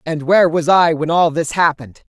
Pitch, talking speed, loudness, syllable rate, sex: 160 Hz, 225 wpm, -14 LUFS, 5.6 syllables/s, female